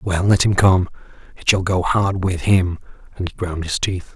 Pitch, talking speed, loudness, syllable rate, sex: 90 Hz, 215 wpm, -19 LUFS, 4.6 syllables/s, male